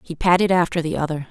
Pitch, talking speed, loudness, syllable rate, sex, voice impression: 170 Hz, 230 wpm, -19 LUFS, 6.6 syllables/s, female, feminine, middle-aged, powerful, hard, fluent, intellectual, calm, elegant, lively, slightly strict, slightly sharp